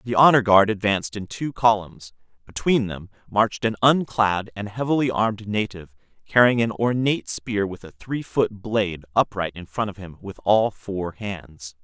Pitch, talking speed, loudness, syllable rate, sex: 105 Hz, 170 wpm, -22 LUFS, 4.8 syllables/s, male